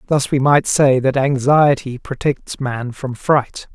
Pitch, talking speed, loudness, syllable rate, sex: 135 Hz, 160 wpm, -16 LUFS, 3.7 syllables/s, male